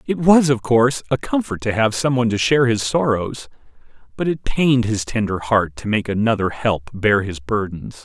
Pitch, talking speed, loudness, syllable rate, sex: 115 Hz, 200 wpm, -19 LUFS, 5.2 syllables/s, male